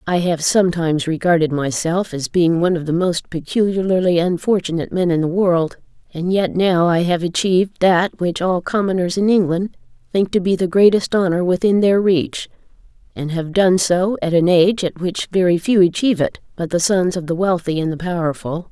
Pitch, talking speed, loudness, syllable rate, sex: 175 Hz, 190 wpm, -17 LUFS, 5.2 syllables/s, female